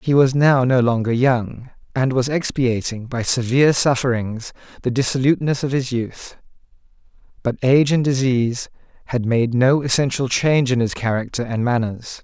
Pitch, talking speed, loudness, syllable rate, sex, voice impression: 125 Hz, 150 wpm, -19 LUFS, 5.1 syllables/s, male, masculine, adult-like, slightly soft, muffled, sincere, reassuring, kind